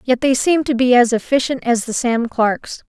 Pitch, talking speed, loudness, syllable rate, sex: 250 Hz, 225 wpm, -16 LUFS, 5.0 syllables/s, female